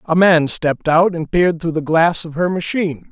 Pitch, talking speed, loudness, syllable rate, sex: 165 Hz, 230 wpm, -16 LUFS, 5.4 syllables/s, male